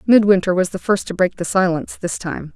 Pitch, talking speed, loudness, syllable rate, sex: 185 Hz, 235 wpm, -18 LUFS, 5.7 syllables/s, female